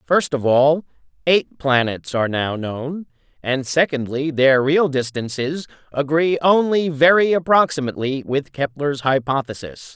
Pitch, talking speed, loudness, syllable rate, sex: 145 Hz, 120 wpm, -19 LUFS, 4.3 syllables/s, male